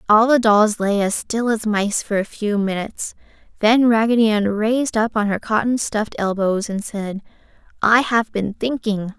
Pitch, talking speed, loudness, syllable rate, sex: 215 Hz, 185 wpm, -19 LUFS, 4.7 syllables/s, female